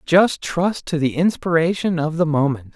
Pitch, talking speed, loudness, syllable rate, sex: 165 Hz, 175 wpm, -19 LUFS, 4.5 syllables/s, male